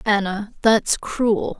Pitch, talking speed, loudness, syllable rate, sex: 210 Hz, 115 wpm, -20 LUFS, 2.9 syllables/s, female